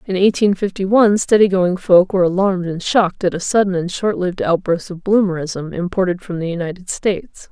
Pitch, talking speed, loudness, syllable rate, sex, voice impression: 185 Hz, 190 wpm, -17 LUFS, 5.8 syllables/s, female, very feminine, very adult-like, slightly thin, slightly tensed, powerful, slightly dark, slightly hard, clear, fluent, slightly raspy, slightly cool, intellectual, refreshing, slightly sincere, calm, slightly friendly, slightly reassuring, unique, elegant, slightly wild, sweet, slightly lively, kind, slightly sharp, slightly modest